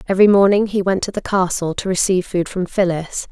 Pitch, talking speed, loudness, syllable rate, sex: 190 Hz, 215 wpm, -17 LUFS, 6.0 syllables/s, female